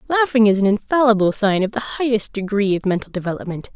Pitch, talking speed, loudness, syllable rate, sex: 215 Hz, 190 wpm, -18 LUFS, 6.2 syllables/s, female